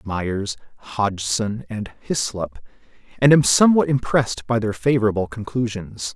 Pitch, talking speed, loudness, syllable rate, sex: 110 Hz, 115 wpm, -20 LUFS, 4.7 syllables/s, male